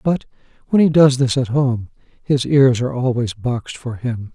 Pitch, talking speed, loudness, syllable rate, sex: 130 Hz, 195 wpm, -17 LUFS, 4.8 syllables/s, male